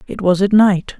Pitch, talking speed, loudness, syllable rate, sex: 195 Hz, 240 wpm, -14 LUFS, 4.9 syllables/s, female